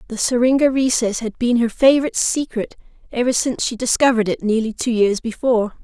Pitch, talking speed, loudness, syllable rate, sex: 240 Hz, 175 wpm, -18 LUFS, 6.1 syllables/s, female